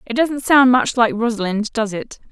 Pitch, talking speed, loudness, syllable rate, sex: 235 Hz, 205 wpm, -17 LUFS, 4.8 syllables/s, female